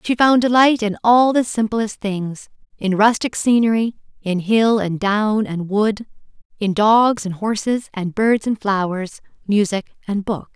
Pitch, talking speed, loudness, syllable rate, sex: 215 Hz, 160 wpm, -18 LUFS, 4.1 syllables/s, female